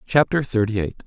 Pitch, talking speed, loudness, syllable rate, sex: 120 Hz, 170 wpm, -21 LUFS, 5.3 syllables/s, male